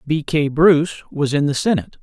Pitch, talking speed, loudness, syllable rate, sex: 155 Hz, 205 wpm, -17 LUFS, 5.8 syllables/s, male